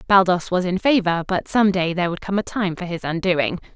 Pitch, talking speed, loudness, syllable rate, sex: 185 Hz, 225 wpm, -20 LUFS, 5.9 syllables/s, female